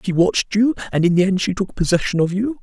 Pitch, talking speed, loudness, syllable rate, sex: 195 Hz, 275 wpm, -18 LUFS, 6.4 syllables/s, male